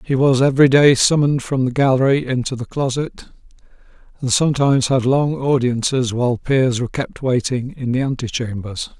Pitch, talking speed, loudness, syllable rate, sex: 130 Hz, 160 wpm, -17 LUFS, 5.4 syllables/s, male